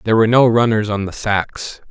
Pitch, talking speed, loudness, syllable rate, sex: 110 Hz, 220 wpm, -16 LUFS, 5.8 syllables/s, male